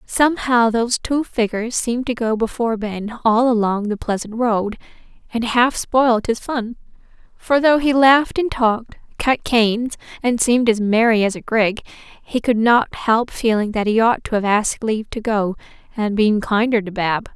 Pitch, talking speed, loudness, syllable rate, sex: 230 Hz, 185 wpm, -18 LUFS, 4.9 syllables/s, female